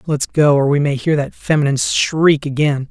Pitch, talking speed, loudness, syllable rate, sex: 145 Hz, 205 wpm, -15 LUFS, 5.0 syllables/s, male